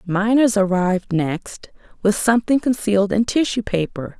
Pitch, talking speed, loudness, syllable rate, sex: 205 Hz, 130 wpm, -19 LUFS, 4.7 syllables/s, female